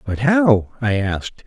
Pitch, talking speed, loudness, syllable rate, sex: 120 Hz, 165 wpm, -18 LUFS, 3.9 syllables/s, male